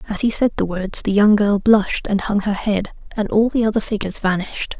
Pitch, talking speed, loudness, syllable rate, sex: 205 Hz, 240 wpm, -18 LUFS, 5.8 syllables/s, female